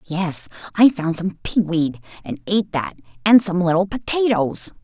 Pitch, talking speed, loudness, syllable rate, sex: 185 Hz, 160 wpm, -19 LUFS, 4.6 syllables/s, female